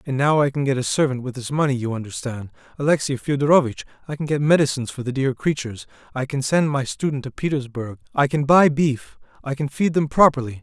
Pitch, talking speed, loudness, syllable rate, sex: 135 Hz, 215 wpm, -21 LUFS, 6.1 syllables/s, male